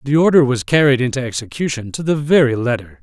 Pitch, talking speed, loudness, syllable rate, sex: 130 Hz, 200 wpm, -16 LUFS, 6.2 syllables/s, male